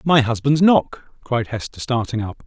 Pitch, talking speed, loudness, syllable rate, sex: 125 Hz, 170 wpm, -19 LUFS, 4.4 syllables/s, male